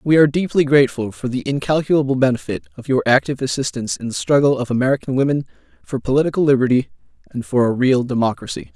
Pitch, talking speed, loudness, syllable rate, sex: 135 Hz, 180 wpm, -18 LUFS, 6.9 syllables/s, male